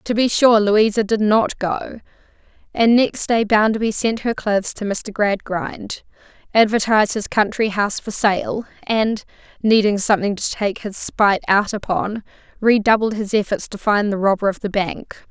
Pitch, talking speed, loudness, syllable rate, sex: 210 Hz, 165 wpm, -18 LUFS, 4.7 syllables/s, female